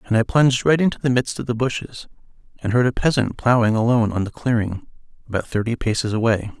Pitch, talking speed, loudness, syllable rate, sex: 115 Hz, 210 wpm, -20 LUFS, 6.4 syllables/s, male